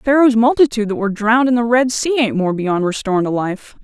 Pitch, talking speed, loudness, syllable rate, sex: 230 Hz, 235 wpm, -16 LUFS, 6.1 syllables/s, female